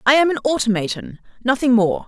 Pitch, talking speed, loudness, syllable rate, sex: 240 Hz, 145 wpm, -18 LUFS, 6.0 syllables/s, female